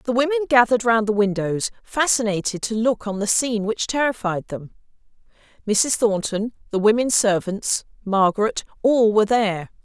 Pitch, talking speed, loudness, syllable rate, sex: 225 Hz, 140 wpm, -20 LUFS, 5.2 syllables/s, female